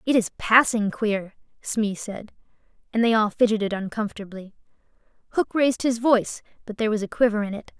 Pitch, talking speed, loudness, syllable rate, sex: 215 Hz, 170 wpm, -23 LUFS, 5.8 syllables/s, female